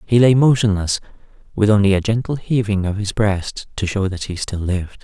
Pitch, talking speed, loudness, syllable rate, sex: 105 Hz, 205 wpm, -18 LUFS, 5.4 syllables/s, male